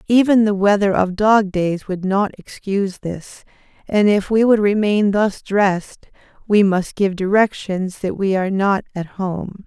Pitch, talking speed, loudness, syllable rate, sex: 200 Hz, 170 wpm, -18 LUFS, 4.3 syllables/s, female